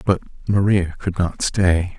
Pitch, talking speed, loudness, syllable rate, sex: 95 Hz, 150 wpm, -20 LUFS, 3.8 syllables/s, male